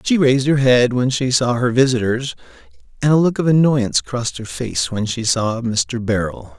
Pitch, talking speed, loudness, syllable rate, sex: 125 Hz, 200 wpm, -17 LUFS, 5.0 syllables/s, male